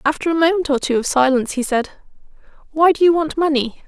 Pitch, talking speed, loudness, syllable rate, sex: 295 Hz, 200 wpm, -17 LUFS, 6.2 syllables/s, female